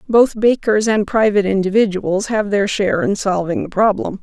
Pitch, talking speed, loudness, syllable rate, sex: 205 Hz, 170 wpm, -16 LUFS, 5.2 syllables/s, female